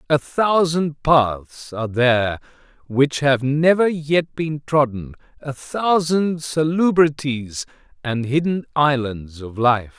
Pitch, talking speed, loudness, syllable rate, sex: 140 Hz, 115 wpm, -19 LUFS, 3.5 syllables/s, male